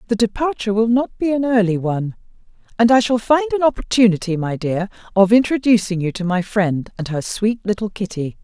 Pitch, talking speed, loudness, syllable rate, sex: 210 Hz, 190 wpm, -18 LUFS, 5.7 syllables/s, female